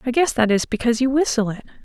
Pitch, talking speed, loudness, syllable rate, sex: 240 Hz, 260 wpm, -19 LUFS, 7.1 syllables/s, female